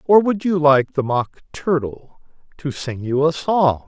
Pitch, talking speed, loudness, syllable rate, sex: 150 Hz, 185 wpm, -19 LUFS, 3.9 syllables/s, male